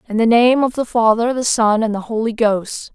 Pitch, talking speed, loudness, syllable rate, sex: 225 Hz, 245 wpm, -16 LUFS, 5.1 syllables/s, female